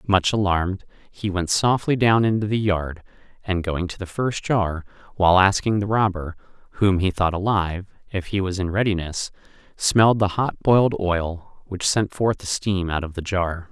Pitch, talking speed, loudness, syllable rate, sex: 95 Hz, 185 wpm, -21 LUFS, 4.8 syllables/s, male